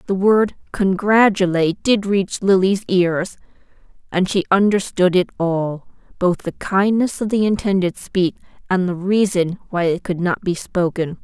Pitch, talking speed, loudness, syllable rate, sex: 190 Hz, 145 wpm, -18 LUFS, 4.3 syllables/s, female